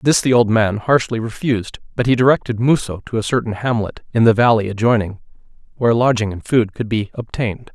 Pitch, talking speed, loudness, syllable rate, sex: 115 Hz, 195 wpm, -17 LUFS, 5.9 syllables/s, male